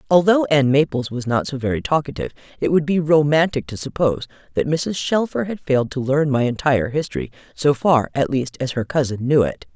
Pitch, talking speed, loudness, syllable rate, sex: 140 Hz, 205 wpm, -20 LUFS, 5.8 syllables/s, female